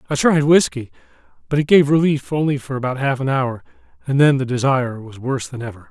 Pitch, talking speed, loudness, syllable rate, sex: 135 Hz, 215 wpm, -18 LUFS, 6.2 syllables/s, male